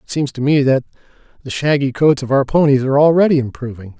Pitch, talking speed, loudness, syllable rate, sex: 140 Hz, 210 wpm, -15 LUFS, 6.4 syllables/s, male